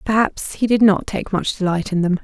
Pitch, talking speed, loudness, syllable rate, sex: 200 Hz, 240 wpm, -18 LUFS, 5.2 syllables/s, female